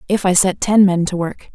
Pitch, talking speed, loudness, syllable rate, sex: 185 Hz, 270 wpm, -15 LUFS, 5.2 syllables/s, female